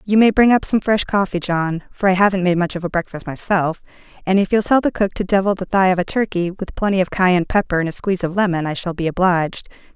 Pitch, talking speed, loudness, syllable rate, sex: 185 Hz, 265 wpm, -18 LUFS, 6.3 syllables/s, female